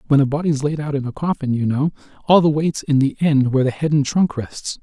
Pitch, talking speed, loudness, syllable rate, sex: 145 Hz, 275 wpm, -19 LUFS, 5.8 syllables/s, male